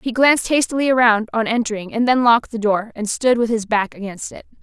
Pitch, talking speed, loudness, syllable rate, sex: 230 Hz, 235 wpm, -18 LUFS, 5.9 syllables/s, female